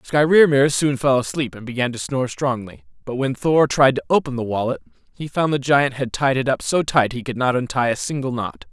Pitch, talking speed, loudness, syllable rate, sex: 130 Hz, 235 wpm, -19 LUFS, 5.4 syllables/s, male